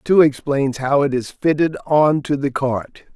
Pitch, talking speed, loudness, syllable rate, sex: 140 Hz, 190 wpm, -18 LUFS, 4.0 syllables/s, male